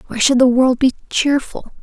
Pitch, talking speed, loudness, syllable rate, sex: 255 Hz, 200 wpm, -15 LUFS, 4.9 syllables/s, female